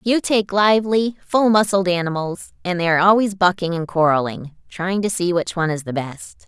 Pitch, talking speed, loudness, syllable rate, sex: 185 Hz, 185 wpm, -19 LUFS, 5.3 syllables/s, female